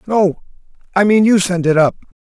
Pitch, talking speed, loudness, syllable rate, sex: 190 Hz, 190 wpm, -14 LUFS, 4.9 syllables/s, male